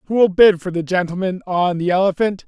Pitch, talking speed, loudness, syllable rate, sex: 185 Hz, 195 wpm, -17 LUFS, 5.4 syllables/s, male